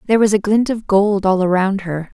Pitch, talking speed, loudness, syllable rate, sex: 200 Hz, 245 wpm, -16 LUFS, 5.6 syllables/s, female